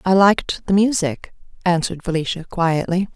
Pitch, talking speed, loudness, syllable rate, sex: 180 Hz, 135 wpm, -19 LUFS, 5.3 syllables/s, female